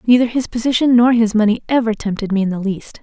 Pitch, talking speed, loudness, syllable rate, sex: 225 Hz, 240 wpm, -16 LUFS, 6.4 syllables/s, female